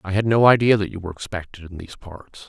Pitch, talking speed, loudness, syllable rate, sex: 100 Hz, 265 wpm, -19 LUFS, 6.9 syllables/s, male